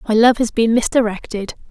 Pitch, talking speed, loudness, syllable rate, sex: 225 Hz, 175 wpm, -17 LUFS, 5.8 syllables/s, female